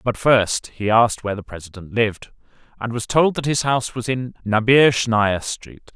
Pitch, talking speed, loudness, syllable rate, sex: 115 Hz, 180 wpm, -19 LUFS, 5.2 syllables/s, male